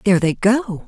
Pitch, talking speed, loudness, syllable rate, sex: 200 Hz, 205 wpm, -17 LUFS, 5.3 syllables/s, female